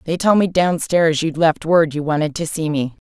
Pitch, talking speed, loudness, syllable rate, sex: 160 Hz, 255 wpm, -17 LUFS, 4.9 syllables/s, female